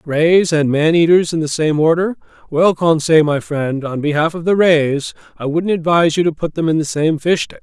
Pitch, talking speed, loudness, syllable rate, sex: 160 Hz, 230 wpm, -15 LUFS, 5.0 syllables/s, male